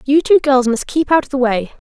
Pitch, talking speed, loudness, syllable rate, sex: 270 Hz, 290 wpm, -15 LUFS, 5.5 syllables/s, female